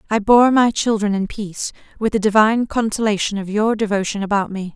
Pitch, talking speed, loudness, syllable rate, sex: 210 Hz, 190 wpm, -18 LUFS, 5.8 syllables/s, female